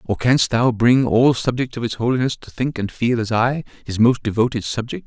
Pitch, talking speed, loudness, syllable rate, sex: 120 Hz, 225 wpm, -19 LUFS, 5.3 syllables/s, male